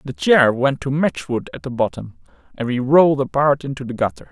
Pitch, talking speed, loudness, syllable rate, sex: 130 Hz, 210 wpm, -18 LUFS, 5.5 syllables/s, male